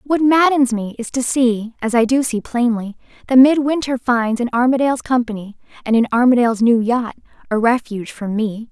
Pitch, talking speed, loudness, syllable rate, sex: 240 Hz, 180 wpm, -16 LUFS, 5.4 syllables/s, female